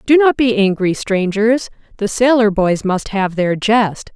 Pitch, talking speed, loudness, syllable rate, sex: 210 Hz, 175 wpm, -15 LUFS, 4.0 syllables/s, female